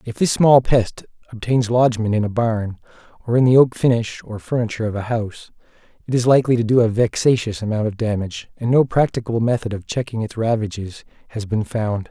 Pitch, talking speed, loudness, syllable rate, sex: 115 Hz, 200 wpm, -19 LUFS, 5.9 syllables/s, male